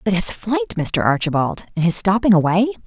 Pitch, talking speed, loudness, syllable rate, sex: 180 Hz, 190 wpm, -17 LUFS, 5.5 syllables/s, female